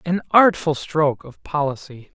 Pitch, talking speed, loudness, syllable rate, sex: 155 Hz, 135 wpm, -19 LUFS, 4.7 syllables/s, male